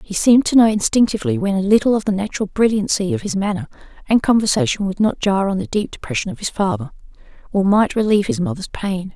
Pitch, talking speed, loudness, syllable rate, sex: 205 Hz, 215 wpm, -18 LUFS, 6.5 syllables/s, female